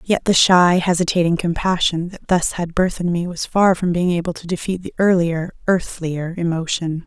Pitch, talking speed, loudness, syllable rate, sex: 175 Hz, 185 wpm, -18 LUFS, 4.9 syllables/s, female